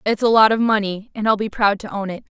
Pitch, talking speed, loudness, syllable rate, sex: 210 Hz, 300 wpm, -18 LUFS, 6.0 syllables/s, female